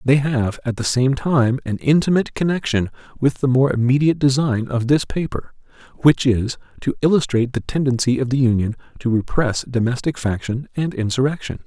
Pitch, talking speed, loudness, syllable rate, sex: 130 Hz, 165 wpm, -19 LUFS, 5.5 syllables/s, male